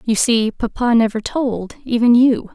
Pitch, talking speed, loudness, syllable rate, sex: 235 Hz, 165 wpm, -16 LUFS, 4.3 syllables/s, female